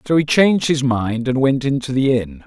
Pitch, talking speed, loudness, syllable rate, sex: 130 Hz, 245 wpm, -17 LUFS, 5.1 syllables/s, male